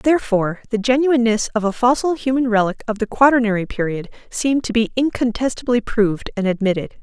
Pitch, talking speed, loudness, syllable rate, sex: 230 Hz, 160 wpm, -18 LUFS, 6.2 syllables/s, female